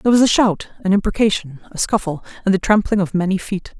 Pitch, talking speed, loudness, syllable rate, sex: 195 Hz, 220 wpm, -18 LUFS, 6.4 syllables/s, female